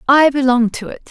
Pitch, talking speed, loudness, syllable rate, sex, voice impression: 260 Hz, 215 wpm, -14 LUFS, 5.3 syllables/s, female, feminine, middle-aged, slightly unique, elegant